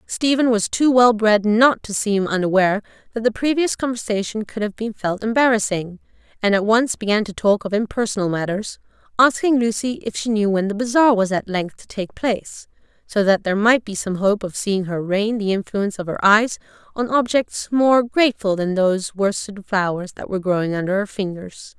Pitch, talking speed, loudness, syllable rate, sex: 210 Hz, 195 wpm, -19 LUFS, 5.3 syllables/s, female